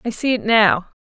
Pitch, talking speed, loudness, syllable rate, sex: 215 Hz, 230 wpm, -16 LUFS, 4.7 syllables/s, female